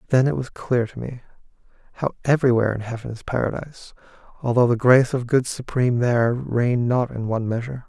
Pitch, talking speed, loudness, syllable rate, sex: 120 Hz, 185 wpm, -21 LUFS, 6.4 syllables/s, male